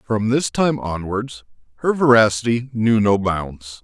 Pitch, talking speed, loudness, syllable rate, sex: 115 Hz, 140 wpm, -18 LUFS, 4.0 syllables/s, male